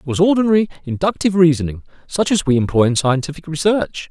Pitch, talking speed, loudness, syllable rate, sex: 160 Hz, 175 wpm, -17 LUFS, 6.5 syllables/s, male